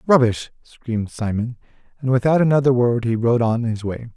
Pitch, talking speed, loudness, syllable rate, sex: 120 Hz, 175 wpm, -19 LUFS, 5.3 syllables/s, male